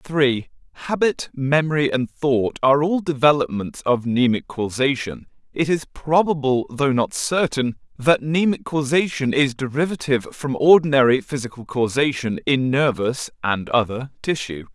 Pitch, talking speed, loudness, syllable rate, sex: 135 Hz, 125 wpm, -20 LUFS, 4.6 syllables/s, male